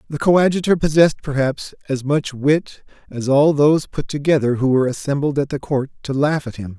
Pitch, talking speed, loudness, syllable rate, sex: 140 Hz, 195 wpm, -18 LUFS, 5.6 syllables/s, male